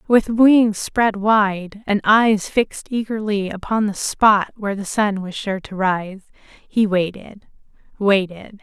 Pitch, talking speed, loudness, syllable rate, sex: 205 Hz, 145 wpm, -18 LUFS, 3.7 syllables/s, female